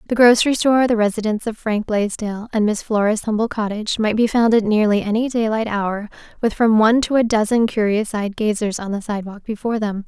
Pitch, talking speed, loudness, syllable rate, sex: 220 Hz, 210 wpm, -18 LUFS, 6.0 syllables/s, female